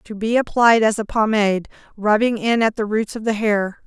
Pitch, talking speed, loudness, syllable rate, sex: 215 Hz, 220 wpm, -18 LUFS, 5.1 syllables/s, female